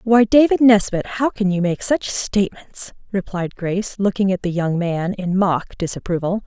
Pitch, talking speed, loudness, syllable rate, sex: 195 Hz, 175 wpm, -19 LUFS, 4.7 syllables/s, female